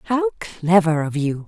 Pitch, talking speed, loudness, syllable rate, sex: 185 Hz, 165 wpm, -20 LUFS, 4.3 syllables/s, female